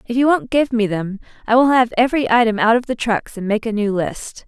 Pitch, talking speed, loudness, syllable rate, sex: 230 Hz, 270 wpm, -17 LUFS, 5.7 syllables/s, female